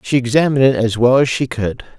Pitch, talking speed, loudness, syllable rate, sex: 125 Hz, 240 wpm, -15 LUFS, 6.3 syllables/s, male